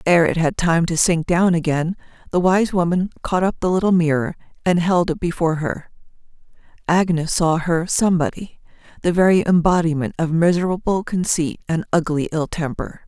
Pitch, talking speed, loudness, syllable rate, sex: 170 Hz, 155 wpm, -19 LUFS, 5.3 syllables/s, female